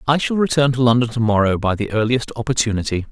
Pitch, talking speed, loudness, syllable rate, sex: 120 Hz, 210 wpm, -18 LUFS, 6.5 syllables/s, male